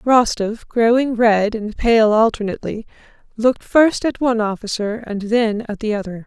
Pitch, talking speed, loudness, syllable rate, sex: 225 Hz, 155 wpm, -18 LUFS, 4.8 syllables/s, female